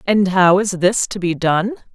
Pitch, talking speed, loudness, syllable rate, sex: 190 Hz, 215 wpm, -16 LUFS, 4.3 syllables/s, female